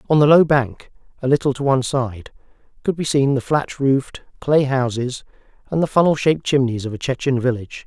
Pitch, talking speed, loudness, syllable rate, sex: 135 Hz, 200 wpm, -19 LUFS, 5.7 syllables/s, male